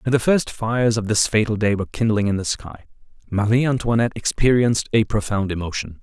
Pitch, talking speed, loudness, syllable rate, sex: 110 Hz, 190 wpm, -20 LUFS, 6.1 syllables/s, male